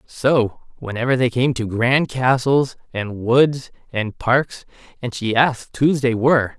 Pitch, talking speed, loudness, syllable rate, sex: 125 Hz, 155 wpm, -19 LUFS, 4.1 syllables/s, male